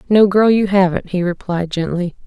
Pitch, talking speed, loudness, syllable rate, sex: 185 Hz, 185 wpm, -16 LUFS, 5.0 syllables/s, female